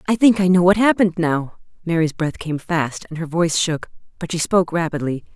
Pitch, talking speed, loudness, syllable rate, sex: 170 Hz, 215 wpm, -19 LUFS, 5.8 syllables/s, female